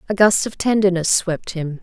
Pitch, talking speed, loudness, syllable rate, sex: 185 Hz, 195 wpm, -18 LUFS, 4.9 syllables/s, female